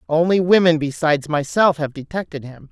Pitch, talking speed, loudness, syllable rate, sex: 160 Hz, 155 wpm, -18 LUFS, 5.5 syllables/s, female